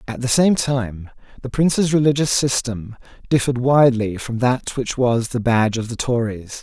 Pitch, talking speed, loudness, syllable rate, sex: 125 Hz, 170 wpm, -19 LUFS, 5.0 syllables/s, male